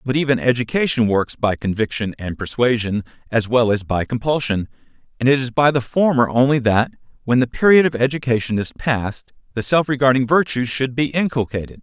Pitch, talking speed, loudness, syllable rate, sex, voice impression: 125 Hz, 180 wpm, -18 LUFS, 5.5 syllables/s, male, masculine, adult-like, slightly middle-aged, tensed, slightly powerful, bright, hard, clear, fluent, cool, intellectual, slightly refreshing, sincere, calm, slightly mature, slightly friendly, reassuring, elegant, slightly wild, kind